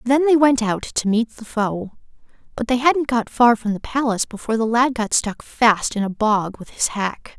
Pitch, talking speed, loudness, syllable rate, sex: 230 Hz, 230 wpm, -19 LUFS, 4.8 syllables/s, female